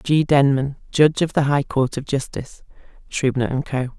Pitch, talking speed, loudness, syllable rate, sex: 140 Hz, 180 wpm, -20 LUFS, 4.8 syllables/s, female